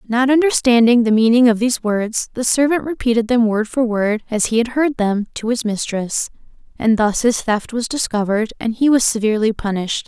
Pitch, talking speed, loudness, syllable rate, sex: 230 Hz, 195 wpm, -17 LUFS, 5.4 syllables/s, female